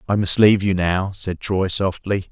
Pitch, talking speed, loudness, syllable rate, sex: 95 Hz, 205 wpm, -19 LUFS, 4.8 syllables/s, male